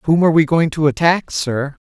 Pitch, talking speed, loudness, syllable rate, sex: 155 Hz, 225 wpm, -16 LUFS, 5.4 syllables/s, male